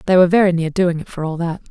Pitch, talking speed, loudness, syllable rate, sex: 175 Hz, 315 wpm, -17 LUFS, 7.4 syllables/s, female